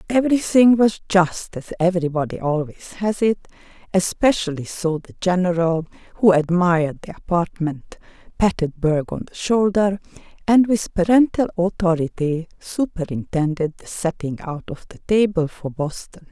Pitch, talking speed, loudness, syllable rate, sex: 180 Hz, 125 wpm, -20 LUFS, 4.7 syllables/s, female